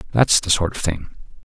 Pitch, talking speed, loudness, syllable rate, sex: 80 Hz, 195 wpm, -18 LUFS, 5.5 syllables/s, male